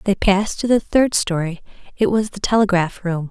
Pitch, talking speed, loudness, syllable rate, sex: 195 Hz, 200 wpm, -18 LUFS, 5.3 syllables/s, female